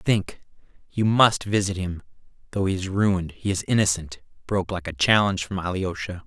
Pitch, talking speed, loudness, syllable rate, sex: 95 Hz, 165 wpm, -23 LUFS, 5.4 syllables/s, male